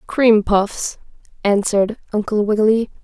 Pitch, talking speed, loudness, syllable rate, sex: 210 Hz, 100 wpm, -17 LUFS, 4.6 syllables/s, female